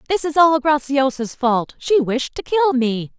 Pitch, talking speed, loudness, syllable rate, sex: 275 Hz, 190 wpm, -18 LUFS, 4.1 syllables/s, female